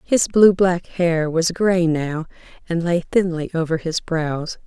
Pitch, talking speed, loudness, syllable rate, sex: 170 Hz, 165 wpm, -19 LUFS, 3.8 syllables/s, female